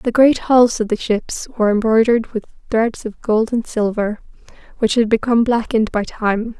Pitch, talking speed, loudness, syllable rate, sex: 225 Hz, 180 wpm, -17 LUFS, 5.1 syllables/s, female